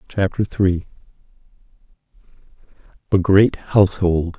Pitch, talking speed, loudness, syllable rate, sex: 95 Hz, 70 wpm, -18 LUFS, 4.0 syllables/s, male